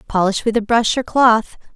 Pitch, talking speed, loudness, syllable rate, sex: 225 Hz, 205 wpm, -16 LUFS, 4.8 syllables/s, female